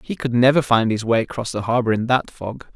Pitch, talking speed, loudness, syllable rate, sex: 120 Hz, 260 wpm, -19 LUFS, 5.3 syllables/s, male